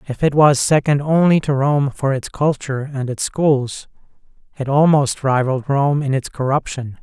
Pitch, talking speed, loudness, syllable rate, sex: 140 Hz, 170 wpm, -17 LUFS, 4.7 syllables/s, male